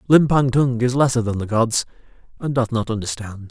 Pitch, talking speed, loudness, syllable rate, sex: 120 Hz, 190 wpm, -20 LUFS, 5.3 syllables/s, male